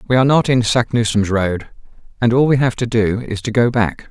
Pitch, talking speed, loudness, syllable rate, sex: 115 Hz, 235 wpm, -16 LUFS, 5.6 syllables/s, male